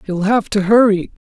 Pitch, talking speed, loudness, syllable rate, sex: 205 Hz, 190 wpm, -15 LUFS, 4.8 syllables/s, female